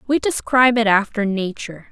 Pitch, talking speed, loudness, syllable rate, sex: 225 Hz, 155 wpm, -18 LUFS, 5.7 syllables/s, female